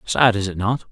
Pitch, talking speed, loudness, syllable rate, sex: 105 Hz, 260 wpm, -19 LUFS, 5.1 syllables/s, male